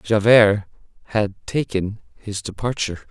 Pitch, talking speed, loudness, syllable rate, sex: 105 Hz, 95 wpm, -20 LUFS, 4.1 syllables/s, male